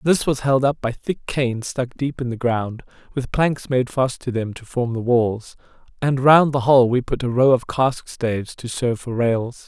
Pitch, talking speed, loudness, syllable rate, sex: 125 Hz, 230 wpm, -20 LUFS, 4.7 syllables/s, male